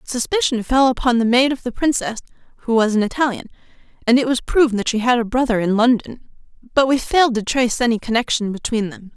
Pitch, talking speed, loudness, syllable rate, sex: 240 Hz, 210 wpm, -18 LUFS, 6.3 syllables/s, female